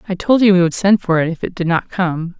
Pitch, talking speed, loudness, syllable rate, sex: 180 Hz, 325 wpm, -15 LUFS, 5.9 syllables/s, female